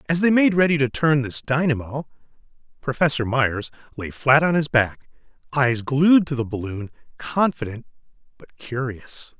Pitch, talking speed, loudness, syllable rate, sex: 135 Hz, 145 wpm, -21 LUFS, 4.6 syllables/s, male